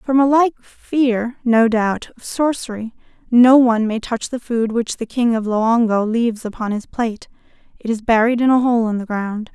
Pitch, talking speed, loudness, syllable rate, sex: 235 Hz, 200 wpm, -17 LUFS, 4.9 syllables/s, female